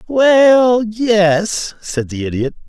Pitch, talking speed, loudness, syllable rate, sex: 200 Hz, 90 wpm, -14 LUFS, 2.5 syllables/s, male